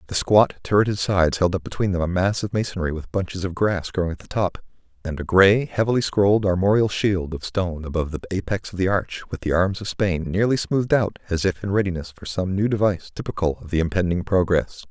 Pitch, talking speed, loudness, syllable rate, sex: 95 Hz, 225 wpm, -22 LUFS, 6.1 syllables/s, male